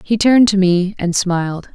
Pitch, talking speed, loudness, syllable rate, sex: 195 Hz, 205 wpm, -15 LUFS, 4.9 syllables/s, female